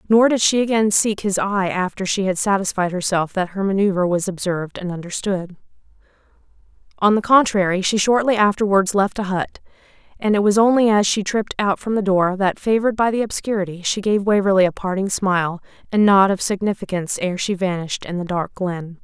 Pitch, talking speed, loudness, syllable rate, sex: 195 Hz, 190 wpm, -19 LUFS, 5.6 syllables/s, female